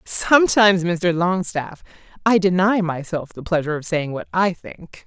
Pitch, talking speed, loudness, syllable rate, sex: 180 Hz, 155 wpm, -19 LUFS, 4.7 syllables/s, female